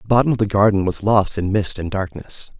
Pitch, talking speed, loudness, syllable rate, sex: 100 Hz, 255 wpm, -19 LUFS, 5.6 syllables/s, male